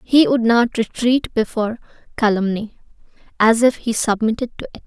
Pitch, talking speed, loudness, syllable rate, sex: 225 Hz, 150 wpm, -18 LUFS, 5.2 syllables/s, female